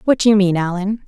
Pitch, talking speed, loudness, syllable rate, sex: 200 Hz, 280 wpm, -16 LUFS, 6.4 syllables/s, female